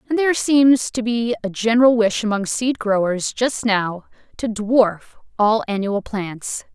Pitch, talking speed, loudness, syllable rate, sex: 220 Hz, 160 wpm, -19 LUFS, 4.2 syllables/s, female